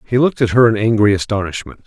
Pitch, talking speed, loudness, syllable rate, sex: 110 Hz, 225 wpm, -15 LUFS, 7.2 syllables/s, male